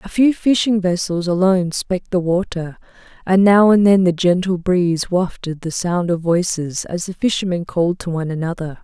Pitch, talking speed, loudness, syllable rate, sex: 180 Hz, 185 wpm, -17 LUFS, 5.2 syllables/s, female